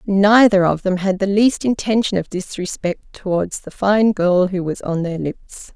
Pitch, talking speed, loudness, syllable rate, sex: 190 Hz, 190 wpm, -18 LUFS, 4.3 syllables/s, female